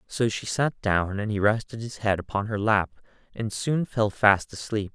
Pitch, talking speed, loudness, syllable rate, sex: 110 Hz, 205 wpm, -25 LUFS, 4.6 syllables/s, male